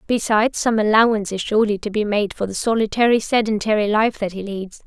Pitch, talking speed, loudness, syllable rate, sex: 215 Hz, 195 wpm, -19 LUFS, 6.2 syllables/s, female